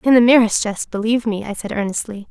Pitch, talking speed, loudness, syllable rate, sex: 220 Hz, 235 wpm, -18 LUFS, 6.3 syllables/s, female